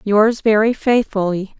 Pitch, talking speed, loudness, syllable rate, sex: 215 Hz, 115 wpm, -16 LUFS, 4.1 syllables/s, female